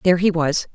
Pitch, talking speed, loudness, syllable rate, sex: 170 Hz, 240 wpm, -19 LUFS, 6.6 syllables/s, female